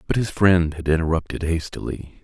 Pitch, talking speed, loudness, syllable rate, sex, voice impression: 85 Hz, 160 wpm, -22 LUFS, 5.3 syllables/s, male, very masculine, very adult-like, slightly old, relaxed, very powerful, dark, soft, very muffled, fluent, very raspy, very cool, very intellectual, slightly sincere, very calm, very mature, very friendly, very reassuring, very unique, very elegant, slightly wild, very sweet, slightly lively, very kind, slightly modest